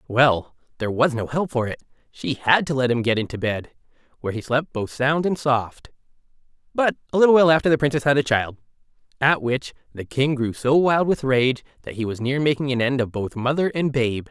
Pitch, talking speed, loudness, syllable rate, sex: 130 Hz, 220 wpm, -21 LUFS, 5.6 syllables/s, male